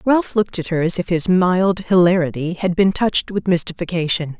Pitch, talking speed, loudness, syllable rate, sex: 180 Hz, 190 wpm, -18 LUFS, 5.4 syllables/s, female